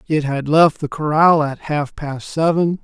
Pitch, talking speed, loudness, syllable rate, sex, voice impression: 150 Hz, 190 wpm, -17 LUFS, 4.1 syllables/s, male, masculine, adult-like, slightly tensed, slightly powerful, bright, soft, slightly raspy, slightly intellectual, calm, friendly, reassuring, lively, kind, slightly modest